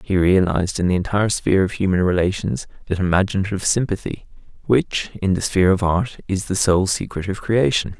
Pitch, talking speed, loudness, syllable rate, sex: 95 Hz, 180 wpm, -19 LUFS, 5.9 syllables/s, male